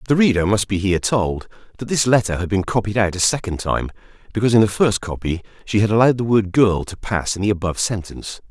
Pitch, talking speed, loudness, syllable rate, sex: 100 Hz, 235 wpm, -19 LUFS, 6.5 syllables/s, male